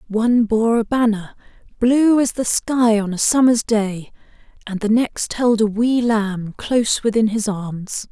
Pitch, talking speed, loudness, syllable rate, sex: 225 Hz, 170 wpm, -18 LUFS, 4.1 syllables/s, female